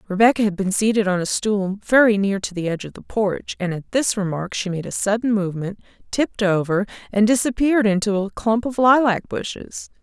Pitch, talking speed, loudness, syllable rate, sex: 205 Hz, 205 wpm, -20 LUFS, 5.6 syllables/s, female